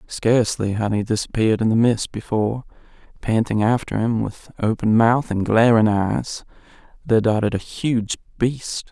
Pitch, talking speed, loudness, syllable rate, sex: 110 Hz, 150 wpm, -20 LUFS, 4.8 syllables/s, male